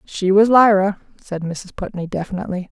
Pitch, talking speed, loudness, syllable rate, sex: 190 Hz, 150 wpm, -18 LUFS, 5.4 syllables/s, female